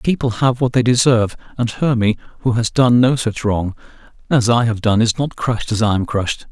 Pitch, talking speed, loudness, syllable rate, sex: 115 Hz, 230 wpm, -17 LUFS, 5.7 syllables/s, male